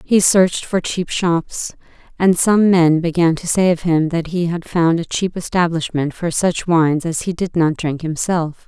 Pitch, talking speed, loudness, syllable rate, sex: 170 Hz, 200 wpm, -17 LUFS, 4.4 syllables/s, female